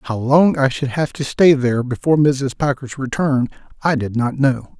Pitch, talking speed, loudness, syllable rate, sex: 135 Hz, 200 wpm, -17 LUFS, 4.8 syllables/s, male